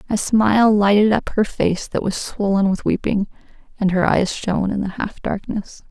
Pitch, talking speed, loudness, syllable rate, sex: 200 Hz, 195 wpm, -19 LUFS, 4.8 syllables/s, female